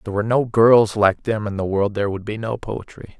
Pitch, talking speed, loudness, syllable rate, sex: 105 Hz, 280 wpm, -19 LUFS, 6.1 syllables/s, male